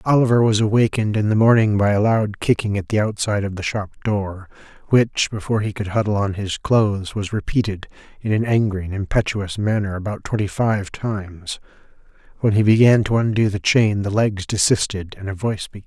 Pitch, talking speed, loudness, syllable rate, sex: 105 Hz, 195 wpm, -19 LUFS, 5.6 syllables/s, male